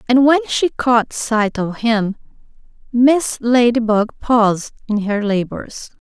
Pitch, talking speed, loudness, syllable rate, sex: 225 Hz, 130 wpm, -16 LUFS, 3.6 syllables/s, female